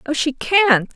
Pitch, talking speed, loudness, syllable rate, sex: 295 Hz, 190 wpm, -16 LUFS, 3.7 syllables/s, female